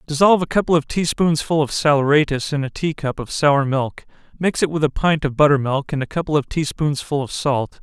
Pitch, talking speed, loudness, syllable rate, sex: 150 Hz, 230 wpm, -19 LUFS, 5.6 syllables/s, male